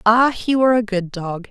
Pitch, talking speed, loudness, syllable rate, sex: 220 Hz, 240 wpm, -18 LUFS, 5.1 syllables/s, female